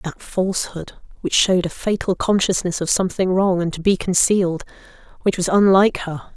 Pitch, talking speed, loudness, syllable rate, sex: 185 Hz, 180 wpm, -19 LUFS, 5.7 syllables/s, female